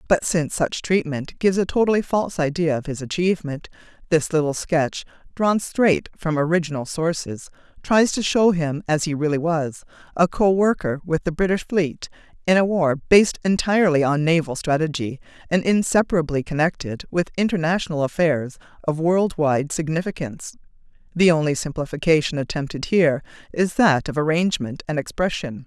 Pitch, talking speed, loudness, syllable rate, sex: 165 Hz, 145 wpm, -21 LUFS, 5.4 syllables/s, female